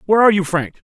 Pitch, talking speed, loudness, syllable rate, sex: 190 Hz, 260 wpm, -16 LUFS, 8.6 syllables/s, male